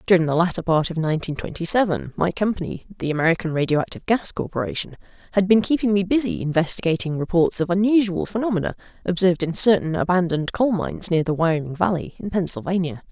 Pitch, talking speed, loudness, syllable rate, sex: 180 Hz, 170 wpm, -21 LUFS, 6.5 syllables/s, female